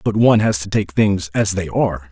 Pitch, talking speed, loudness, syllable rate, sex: 100 Hz, 255 wpm, -17 LUFS, 5.6 syllables/s, male